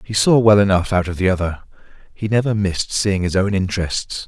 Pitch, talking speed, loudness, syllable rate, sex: 100 Hz, 210 wpm, -18 LUFS, 5.7 syllables/s, male